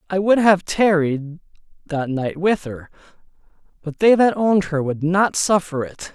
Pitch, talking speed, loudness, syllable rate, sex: 170 Hz, 165 wpm, -18 LUFS, 4.0 syllables/s, male